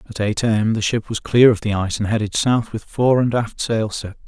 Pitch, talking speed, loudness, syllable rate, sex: 110 Hz, 280 wpm, -19 LUFS, 5.5 syllables/s, male